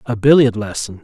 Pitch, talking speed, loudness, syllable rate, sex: 115 Hz, 175 wpm, -15 LUFS, 5.5 syllables/s, male